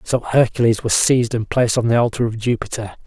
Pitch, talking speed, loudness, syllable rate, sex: 115 Hz, 215 wpm, -18 LUFS, 6.2 syllables/s, male